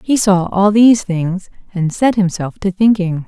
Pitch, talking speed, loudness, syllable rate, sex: 195 Hz, 185 wpm, -14 LUFS, 4.4 syllables/s, female